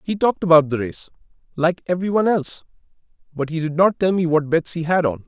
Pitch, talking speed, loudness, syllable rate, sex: 165 Hz, 215 wpm, -19 LUFS, 6.3 syllables/s, male